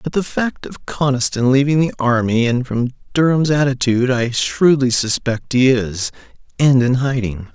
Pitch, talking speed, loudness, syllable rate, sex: 125 Hz, 160 wpm, -17 LUFS, 4.5 syllables/s, male